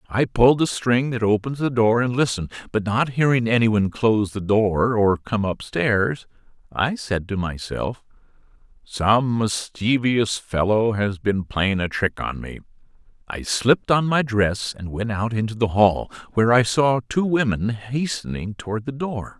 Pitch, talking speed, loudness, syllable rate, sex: 115 Hz, 170 wpm, -21 LUFS, 4.5 syllables/s, male